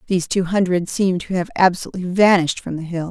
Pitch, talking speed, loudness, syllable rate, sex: 180 Hz, 210 wpm, -19 LUFS, 6.8 syllables/s, female